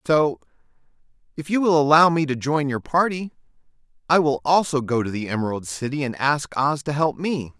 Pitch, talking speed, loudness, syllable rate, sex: 140 Hz, 190 wpm, -21 LUFS, 5.3 syllables/s, male